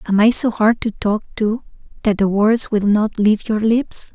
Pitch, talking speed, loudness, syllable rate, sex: 215 Hz, 215 wpm, -17 LUFS, 4.5 syllables/s, female